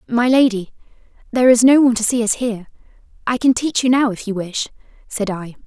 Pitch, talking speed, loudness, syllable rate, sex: 230 Hz, 210 wpm, -17 LUFS, 6.3 syllables/s, female